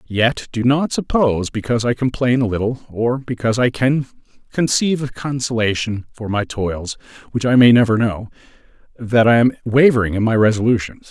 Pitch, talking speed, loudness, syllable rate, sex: 120 Hz, 170 wpm, -17 LUFS, 5.4 syllables/s, male